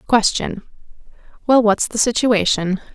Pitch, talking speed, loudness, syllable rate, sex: 215 Hz, 60 wpm, -17 LUFS, 4.3 syllables/s, female